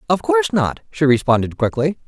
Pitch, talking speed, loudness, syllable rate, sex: 160 Hz, 175 wpm, -18 LUFS, 5.7 syllables/s, male